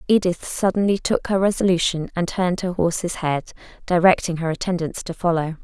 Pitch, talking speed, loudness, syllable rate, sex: 175 Hz, 160 wpm, -21 LUFS, 5.5 syllables/s, female